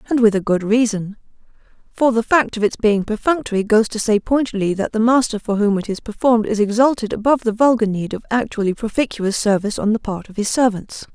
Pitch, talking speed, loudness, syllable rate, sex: 220 Hz, 215 wpm, -18 LUFS, 6.0 syllables/s, female